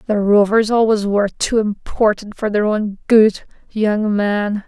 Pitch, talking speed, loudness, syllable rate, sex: 210 Hz, 155 wpm, -16 LUFS, 4.1 syllables/s, female